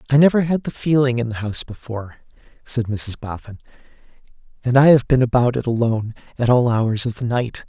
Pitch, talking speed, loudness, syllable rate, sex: 120 Hz, 195 wpm, -19 LUFS, 5.9 syllables/s, male